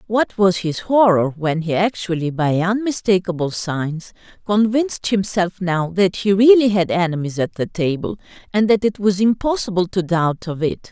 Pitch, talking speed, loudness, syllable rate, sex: 190 Hz, 165 wpm, -18 LUFS, 4.7 syllables/s, female